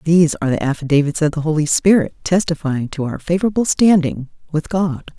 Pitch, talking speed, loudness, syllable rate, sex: 160 Hz, 175 wpm, -17 LUFS, 5.9 syllables/s, female